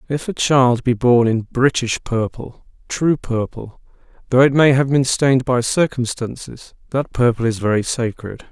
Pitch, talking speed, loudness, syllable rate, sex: 125 Hz, 150 wpm, -17 LUFS, 4.5 syllables/s, male